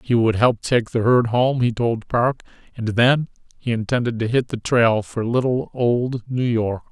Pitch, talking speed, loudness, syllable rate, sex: 120 Hz, 200 wpm, -20 LUFS, 4.3 syllables/s, male